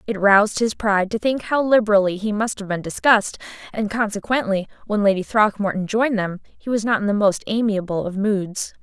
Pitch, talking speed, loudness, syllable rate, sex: 210 Hz, 195 wpm, -20 LUFS, 5.6 syllables/s, female